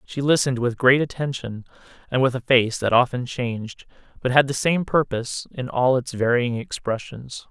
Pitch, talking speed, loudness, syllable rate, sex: 125 Hz, 175 wpm, -22 LUFS, 5.1 syllables/s, male